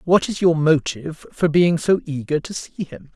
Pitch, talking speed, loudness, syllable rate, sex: 160 Hz, 210 wpm, -19 LUFS, 4.7 syllables/s, male